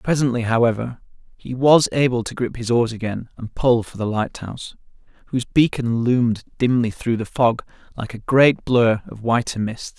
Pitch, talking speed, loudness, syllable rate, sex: 120 Hz, 175 wpm, -20 LUFS, 5.0 syllables/s, male